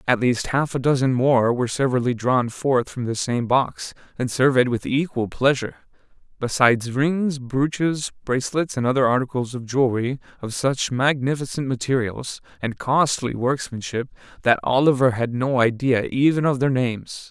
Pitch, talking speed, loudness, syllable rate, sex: 130 Hz, 155 wpm, -21 LUFS, 5.0 syllables/s, male